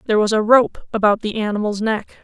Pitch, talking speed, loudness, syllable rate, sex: 215 Hz, 215 wpm, -18 LUFS, 6.1 syllables/s, female